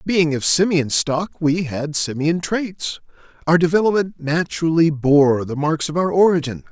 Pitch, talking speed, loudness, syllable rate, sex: 160 Hz, 150 wpm, -18 LUFS, 4.5 syllables/s, male